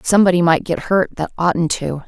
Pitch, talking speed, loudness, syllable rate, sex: 175 Hz, 200 wpm, -17 LUFS, 5.5 syllables/s, female